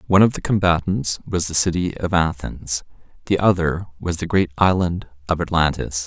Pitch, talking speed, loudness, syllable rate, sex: 85 Hz, 170 wpm, -20 LUFS, 5.2 syllables/s, male